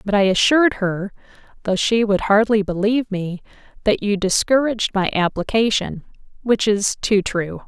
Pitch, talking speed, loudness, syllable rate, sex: 205 Hz, 150 wpm, -19 LUFS, 4.9 syllables/s, female